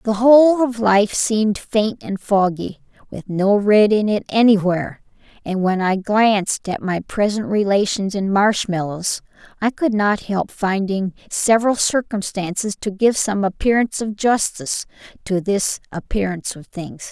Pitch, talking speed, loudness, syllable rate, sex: 205 Hz, 145 wpm, -18 LUFS, 4.5 syllables/s, female